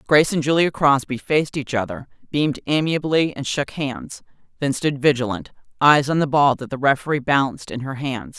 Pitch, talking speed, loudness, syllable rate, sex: 140 Hz, 185 wpm, -20 LUFS, 5.5 syllables/s, female